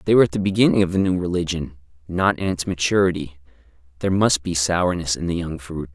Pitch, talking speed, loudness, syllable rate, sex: 85 Hz, 210 wpm, -21 LUFS, 6.4 syllables/s, male